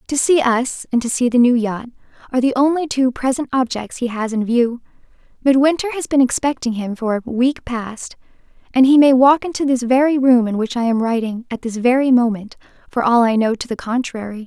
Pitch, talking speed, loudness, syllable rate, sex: 250 Hz, 215 wpm, -17 LUFS, 5.5 syllables/s, female